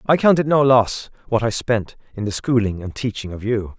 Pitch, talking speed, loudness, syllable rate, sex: 115 Hz, 240 wpm, -19 LUFS, 5.2 syllables/s, male